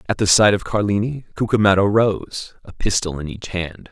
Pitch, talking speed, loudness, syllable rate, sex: 100 Hz, 185 wpm, -19 LUFS, 5.1 syllables/s, male